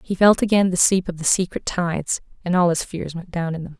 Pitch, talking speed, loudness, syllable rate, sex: 175 Hz, 270 wpm, -20 LUFS, 5.8 syllables/s, female